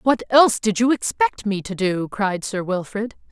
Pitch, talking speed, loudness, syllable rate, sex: 215 Hz, 200 wpm, -20 LUFS, 4.7 syllables/s, female